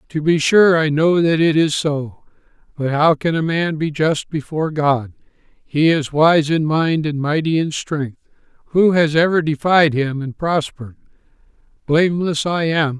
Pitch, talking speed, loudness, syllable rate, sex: 155 Hz, 170 wpm, -17 LUFS, 4.4 syllables/s, male